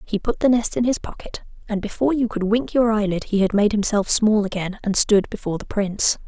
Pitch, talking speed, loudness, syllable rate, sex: 210 Hz, 240 wpm, -20 LUFS, 5.8 syllables/s, female